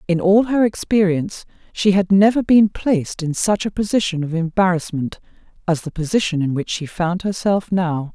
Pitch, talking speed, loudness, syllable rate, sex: 185 Hz, 175 wpm, -18 LUFS, 5.1 syllables/s, female